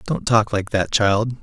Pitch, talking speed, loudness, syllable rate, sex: 110 Hz, 210 wpm, -19 LUFS, 4.0 syllables/s, male